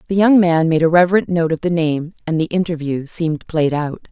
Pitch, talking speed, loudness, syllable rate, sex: 165 Hz, 235 wpm, -17 LUFS, 5.6 syllables/s, female